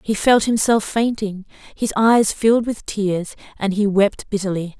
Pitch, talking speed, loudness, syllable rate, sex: 205 Hz, 165 wpm, -19 LUFS, 4.4 syllables/s, female